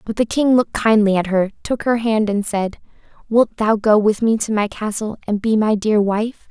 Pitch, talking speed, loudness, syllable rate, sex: 215 Hz, 230 wpm, -18 LUFS, 4.9 syllables/s, female